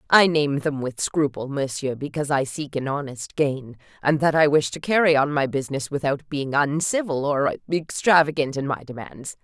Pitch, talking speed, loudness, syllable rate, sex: 145 Hz, 185 wpm, -22 LUFS, 4.9 syllables/s, female